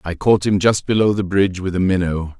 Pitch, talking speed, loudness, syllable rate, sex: 95 Hz, 250 wpm, -17 LUFS, 5.7 syllables/s, male